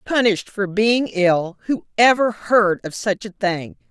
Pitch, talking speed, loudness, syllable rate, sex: 205 Hz, 155 wpm, -19 LUFS, 4.2 syllables/s, female